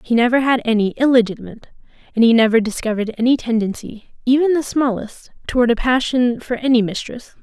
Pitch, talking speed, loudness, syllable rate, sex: 240 Hz, 160 wpm, -17 LUFS, 6.1 syllables/s, female